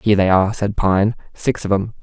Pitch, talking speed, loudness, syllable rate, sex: 100 Hz, 235 wpm, -18 LUFS, 5.7 syllables/s, male